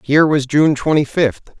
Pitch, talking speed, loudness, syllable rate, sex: 145 Hz, 190 wpm, -15 LUFS, 4.7 syllables/s, male